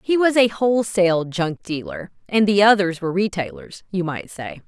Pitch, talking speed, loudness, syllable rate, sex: 195 Hz, 180 wpm, -20 LUFS, 5.1 syllables/s, female